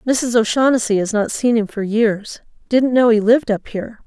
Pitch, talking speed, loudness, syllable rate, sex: 225 Hz, 190 wpm, -17 LUFS, 5.2 syllables/s, female